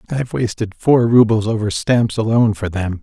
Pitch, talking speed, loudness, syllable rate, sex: 110 Hz, 200 wpm, -16 LUFS, 5.3 syllables/s, male